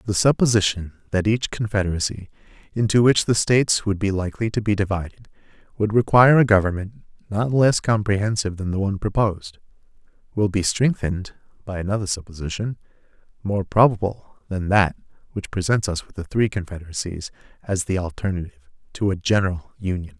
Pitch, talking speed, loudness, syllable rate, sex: 100 Hz, 145 wpm, -21 LUFS, 5.9 syllables/s, male